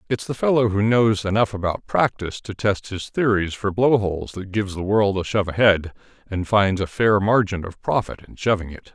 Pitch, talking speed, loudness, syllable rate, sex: 100 Hz, 215 wpm, -21 LUFS, 5.4 syllables/s, male